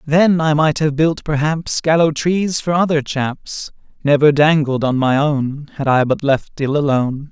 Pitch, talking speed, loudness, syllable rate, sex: 150 Hz, 180 wpm, -16 LUFS, 4.3 syllables/s, male